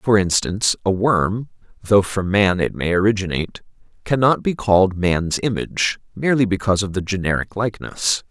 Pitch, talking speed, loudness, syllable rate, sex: 100 Hz, 150 wpm, -19 LUFS, 5.4 syllables/s, male